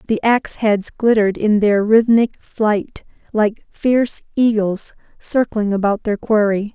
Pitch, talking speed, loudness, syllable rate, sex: 215 Hz, 135 wpm, -17 LUFS, 4.1 syllables/s, female